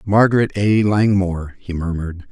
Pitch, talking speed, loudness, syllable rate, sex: 95 Hz, 130 wpm, -18 LUFS, 5.1 syllables/s, male